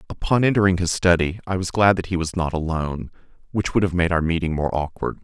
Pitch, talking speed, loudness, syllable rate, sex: 85 Hz, 230 wpm, -21 LUFS, 6.2 syllables/s, male